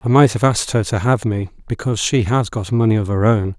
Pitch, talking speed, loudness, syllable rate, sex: 110 Hz, 270 wpm, -17 LUFS, 6.1 syllables/s, male